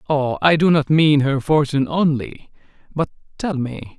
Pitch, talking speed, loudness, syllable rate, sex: 150 Hz, 165 wpm, -18 LUFS, 4.6 syllables/s, male